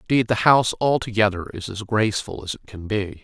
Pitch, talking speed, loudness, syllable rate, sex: 105 Hz, 205 wpm, -21 LUFS, 6.2 syllables/s, male